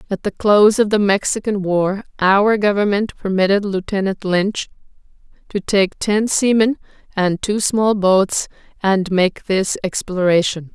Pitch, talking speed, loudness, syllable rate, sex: 200 Hz, 135 wpm, -17 LUFS, 4.2 syllables/s, female